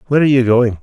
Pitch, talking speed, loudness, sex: 125 Hz, 290 wpm, -13 LUFS, male